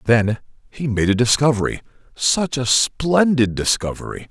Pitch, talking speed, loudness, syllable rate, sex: 125 Hz, 125 wpm, -18 LUFS, 4.8 syllables/s, male